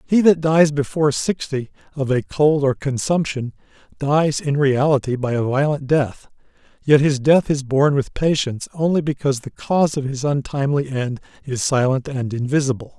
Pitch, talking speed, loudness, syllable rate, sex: 140 Hz, 165 wpm, -19 LUFS, 5.1 syllables/s, male